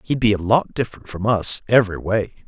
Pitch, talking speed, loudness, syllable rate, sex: 105 Hz, 220 wpm, -19 LUFS, 5.9 syllables/s, male